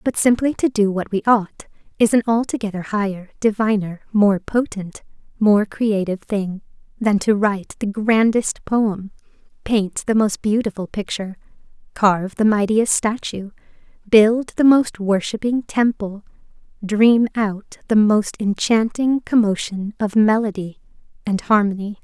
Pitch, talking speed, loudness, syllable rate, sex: 210 Hz, 130 wpm, -19 LUFS, 4.3 syllables/s, female